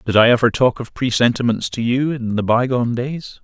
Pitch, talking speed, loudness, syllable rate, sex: 120 Hz, 210 wpm, -18 LUFS, 5.4 syllables/s, male